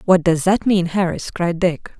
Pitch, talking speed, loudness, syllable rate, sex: 180 Hz, 210 wpm, -18 LUFS, 4.3 syllables/s, female